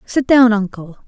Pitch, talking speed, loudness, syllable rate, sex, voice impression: 220 Hz, 165 wpm, -13 LUFS, 4.5 syllables/s, female, feminine, slightly young, tensed, powerful, slightly soft, clear, slightly cute, friendly, unique, lively, slightly intense